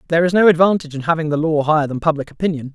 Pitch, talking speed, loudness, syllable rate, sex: 160 Hz, 265 wpm, -17 LUFS, 8.3 syllables/s, male